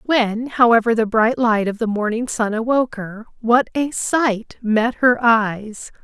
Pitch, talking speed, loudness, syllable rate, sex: 230 Hz, 170 wpm, -18 LUFS, 4.0 syllables/s, female